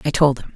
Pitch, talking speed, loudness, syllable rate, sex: 140 Hz, 325 wpm, -18 LUFS, 6.7 syllables/s, female